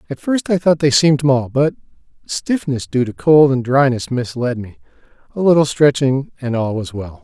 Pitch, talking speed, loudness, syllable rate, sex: 140 Hz, 190 wpm, -16 LUFS, 5.1 syllables/s, male